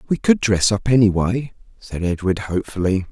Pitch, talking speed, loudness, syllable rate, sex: 105 Hz, 155 wpm, -19 LUFS, 5.3 syllables/s, male